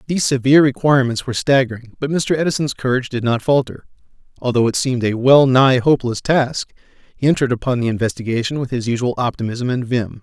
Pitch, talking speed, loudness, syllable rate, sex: 125 Hz, 180 wpm, -17 LUFS, 6.6 syllables/s, male